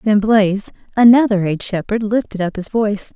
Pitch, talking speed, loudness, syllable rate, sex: 210 Hz, 170 wpm, -16 LUFS, 5.7 syllables/s, female